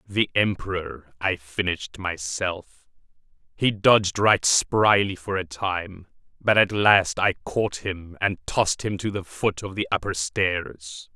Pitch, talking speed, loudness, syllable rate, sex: 95 Hz, 150 wpm, -23 LUFS, 3.8 syllables/s, male